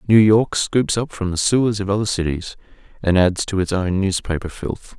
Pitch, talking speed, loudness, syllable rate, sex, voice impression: 100 Hz, 205 wpm, -19 LUFS, 5.0 syllables/s, male, masculine, adult-like, cool, slightly intellectual, sincere, slightly friendly, slightly sweet